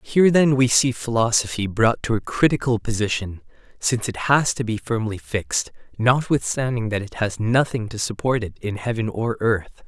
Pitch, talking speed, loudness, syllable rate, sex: 115 Hz, 175 wpm, -21 LUFS, 5.0 syllables/s, male